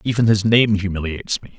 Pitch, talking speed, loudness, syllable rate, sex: 105 Hz, 190 wpm, -18 LUFS, 6.3 syllables/s, male